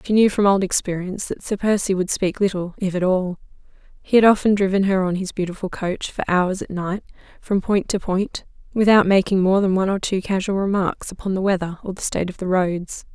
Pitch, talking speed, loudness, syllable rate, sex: 190 Hz, 225 wpm, -20 LUFS, 5.7 syllables/s, female